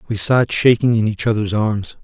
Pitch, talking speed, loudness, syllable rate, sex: 110 Hz, 205 wpm, -16 LUFS, 4.9 syllables/s, male